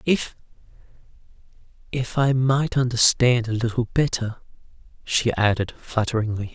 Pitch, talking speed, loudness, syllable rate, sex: 120 Hz, 90 wpm, -22 LUFS, 4.5 syllables/s, male